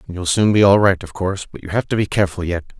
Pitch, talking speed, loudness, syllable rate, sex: 95 Hz, 300 wpm, -17 LUFS, 6.8 syllables/s, male